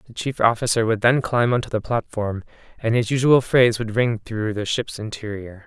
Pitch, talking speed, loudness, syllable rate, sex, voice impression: 115 Hz, 200 wpm, -21 LUFS, 5.2 syllables/s, male, masculine, adult-like, slightly refreshing, slightly calm, slightly unique